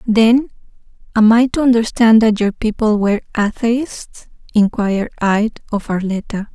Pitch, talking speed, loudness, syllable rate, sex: 220 Hz, 130 wpm, -15 LUFS, 4.4 syllables/s, female